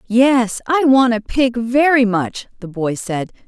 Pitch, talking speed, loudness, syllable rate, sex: 235 Hz, 170 wpm, -16 LUFS, 3.6 syllables/s, female